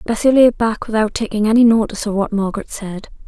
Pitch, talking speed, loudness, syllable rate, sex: 220 Hz, 200 wpm, -16 LUFS, 6.3 syllables/s, female